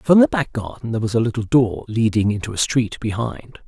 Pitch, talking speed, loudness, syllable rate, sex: 115 Hz, 230 wpm, -20 LUFS, 5.7 syllables/s, male